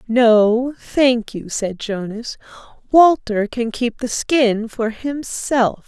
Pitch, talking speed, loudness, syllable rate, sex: 235 Hz, 125 wpm, -18 LUFS, 2.9 syllables/s, female